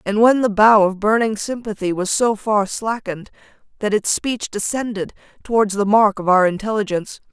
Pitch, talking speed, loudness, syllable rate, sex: 210 Hz, 170 wpm, -18 LUFS, 5.2 syllables/s, female